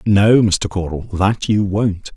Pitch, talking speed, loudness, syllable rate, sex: 100 Hz, 165 wpm, -16 LUFS, 3.6 syllables/s, male